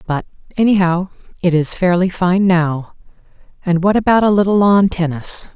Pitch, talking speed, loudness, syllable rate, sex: 180 Hz, 150 wpm, -15 LUFS, 4.9 syllables/s, female